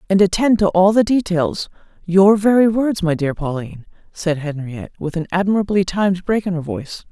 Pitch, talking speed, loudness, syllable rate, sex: 185 Hz, 175 wpm, -17 LUFS, 5.5 syllables/s, female